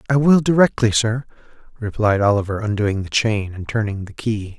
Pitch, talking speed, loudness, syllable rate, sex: 110 Hz, 170 wpm, -19 LUFS, 5.2 syllables/s, male